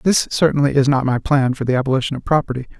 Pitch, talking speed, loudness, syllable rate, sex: 135 Hz, 235 wpm, -17 LUFS, 7.0 syllables/s, male